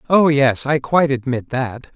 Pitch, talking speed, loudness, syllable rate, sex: 140 Hz, 185 wpm, -17 LUFS, 4.6 syllables/s, male